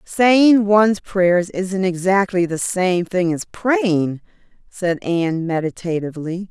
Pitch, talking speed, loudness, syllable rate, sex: 185 Hz, 120 wpm, -18 LUFS, 3.8 syllables/s, female